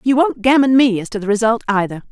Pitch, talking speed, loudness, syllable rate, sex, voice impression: 230 Hz, 255 wpm, -15 LUFS, 6.2 syllables/s, female, very feminine, adult-like, slightly middle-aged, very thin, tensed, slightly powerful, very weak, bright, hard, cute, very intellectual, very refreshing, very sincere, very calm, very friendly, very reassuring, very unique, elegant, very wild, lively, very kind, modest